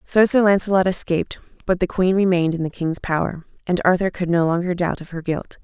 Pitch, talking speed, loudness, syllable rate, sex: 180 Hz, 225 wpm, -20 LUFS, 6.0 syllables/s, female